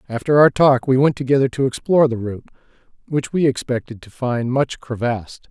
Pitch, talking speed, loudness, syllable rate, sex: 130 Hz, 185 wpm, -18 LUFS, 5.8 syllables/s, male